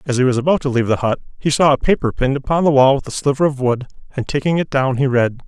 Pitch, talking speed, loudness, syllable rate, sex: 135 Hz, 295 wpm, -17 LUFS, 7.0 syllables/s, male